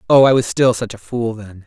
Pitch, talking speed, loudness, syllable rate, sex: 115 Hz, 290 wpm, -16 LUFS, 5.4 syllables/s, male